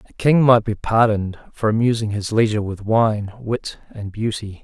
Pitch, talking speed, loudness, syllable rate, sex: 110 Hz, 180 wpm, -19 LUFS, 5.0 syllables/s, male